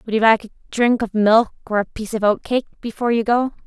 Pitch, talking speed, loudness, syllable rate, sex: 225 Hz, 245 wpm, -19 LUFS, 6.8 syllables/s, female